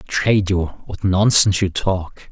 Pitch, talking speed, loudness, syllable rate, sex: 95 Hz, 155 wpm, -18 LUFS, 4.0 syllables/s, male